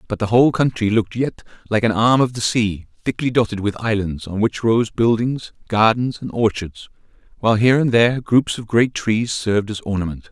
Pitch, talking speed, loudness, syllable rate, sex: 110 Hz, 200 wpm, -18 LUFS, 5.4 syllables/s, male